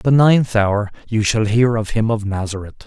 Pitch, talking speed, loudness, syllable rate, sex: 110 Hz, 230 wpm, -17 LUFS, 4.9 syllables/s, male